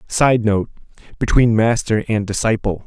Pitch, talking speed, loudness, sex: 110 Hz, 105 wpm, -17 LUFS, male